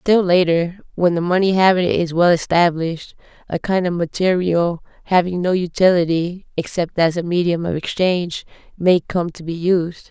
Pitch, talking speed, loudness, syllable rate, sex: 175 Hz, 160 wpm, -18 LUFS, 4.8 syllables/s, female